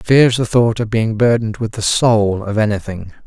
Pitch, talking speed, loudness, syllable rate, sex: 110 Hz, 200 wpm, -15 LUFS, 4.9 syllables/s, male